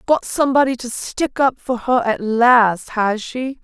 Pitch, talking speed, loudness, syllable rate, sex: 245 Hz, 180 wpm, -17 LUFS, 4.0 syllables/s, female